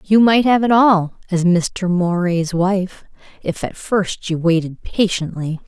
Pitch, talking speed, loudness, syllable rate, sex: 185 Hz, 160 wpm, -17 LUFS, 3.8 syllables/s, female